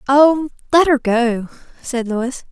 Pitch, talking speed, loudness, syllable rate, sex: 260 Hz, 145 wpm, -16 LUFS, 3.4 syllables/s, female